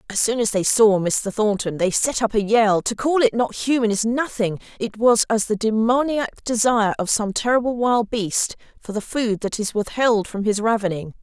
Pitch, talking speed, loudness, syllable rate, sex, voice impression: 220 Hz, 200 wpm, -20 LUFS, 4.9 syllables/s, female, feminine, very adult-like, slightly powerful, intellectual, slightly intense, slightly sharp